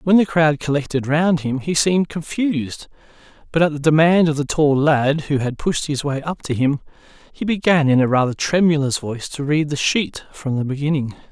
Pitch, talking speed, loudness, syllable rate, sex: 150 Hz, 205 wpm, -19 LUFS, 5.3 syllables/s, male